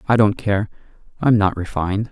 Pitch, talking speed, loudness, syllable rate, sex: 105 Hz, 170 wpm, -19 LUFS, 5.6 syllables/s, male